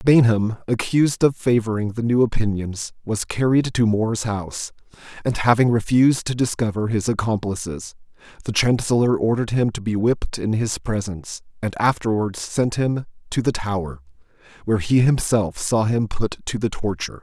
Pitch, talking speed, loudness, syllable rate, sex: 115 Hz, 155 wpm, -21 LUFS, 5.2 syllables/s, male